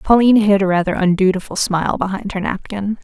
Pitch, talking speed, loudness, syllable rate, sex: 195 Hz, 180 wpm, -16 LUFS, 6.2 syllables/s, female